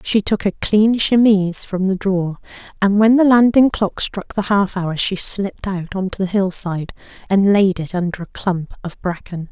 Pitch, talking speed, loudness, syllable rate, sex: 195 Hz, 200 wpm, -17 LUFS, 4.8 syllables/s, female